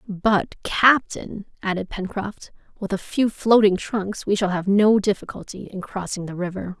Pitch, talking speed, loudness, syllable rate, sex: 200 Hz, 160 wpm, -21 LUFS, 4.4 syllables/s, female